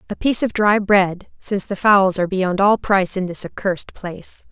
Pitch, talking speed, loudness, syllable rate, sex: 195 Hz, 215 wpm, -18 LUFS, 5.5 syllables/s, female